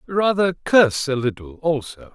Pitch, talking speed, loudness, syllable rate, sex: 150 Hz, 140 wpm, -20 LUFS, 4.5 syllables/s, male